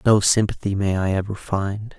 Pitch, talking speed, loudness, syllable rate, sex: 100 Hz, 180 wpm, -21 LUFS, 4.8 syllables/s, male